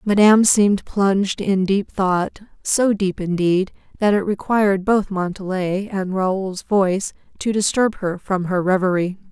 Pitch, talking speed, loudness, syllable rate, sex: 195 Hz, 150 wpm, -19 LUFS, 4.3 syllables/s, female